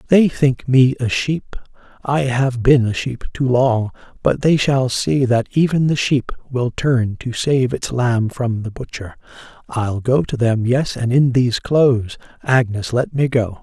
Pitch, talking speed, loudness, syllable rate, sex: 125 Hz, 180 wpm, -17 LUFS, 4.1 syllables/s, male